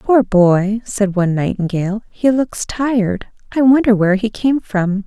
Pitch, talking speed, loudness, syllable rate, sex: 215 Hz, 165 wpm, -16 LUFS, 4.5 syllables/s, female